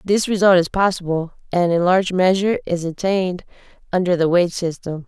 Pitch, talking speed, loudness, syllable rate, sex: 180 Hz, 165 wpm, -18 LUFS, 5.7 syllables/s, female